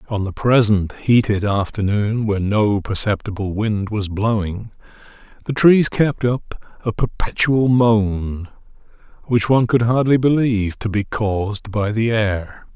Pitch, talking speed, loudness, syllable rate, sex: 110 Hz, 135 wpm, -18 LUFS, 4.0 syllables/s, male